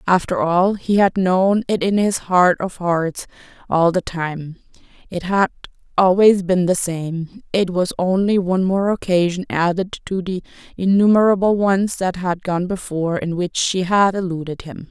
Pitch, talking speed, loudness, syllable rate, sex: 185 Hz, 155 wpm, -18 LUFS, 4.4 syllables/s, female